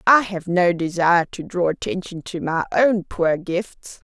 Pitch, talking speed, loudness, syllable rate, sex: 180 Hz, 175 wpm, -20 LUFS, 4.2 syllables/s, female